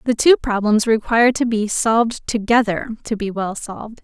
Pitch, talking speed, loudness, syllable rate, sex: 225 Hz, 180 wpm, -18 LUFS, 5.1 syllables/s, female